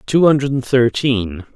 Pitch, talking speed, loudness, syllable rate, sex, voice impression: 125 Hz, 115 wpm, -16 LUFS, 3.7 syllables/s, male, very masculine, very adult-like, old, very thick, tensed, very powerful, bright, very hard, very clear, fluent, slightly raspy, very cool, very intellectual, very sincere, calm, very mature, slightly friendly, reassuring, very unique, very wild, very strict, sharp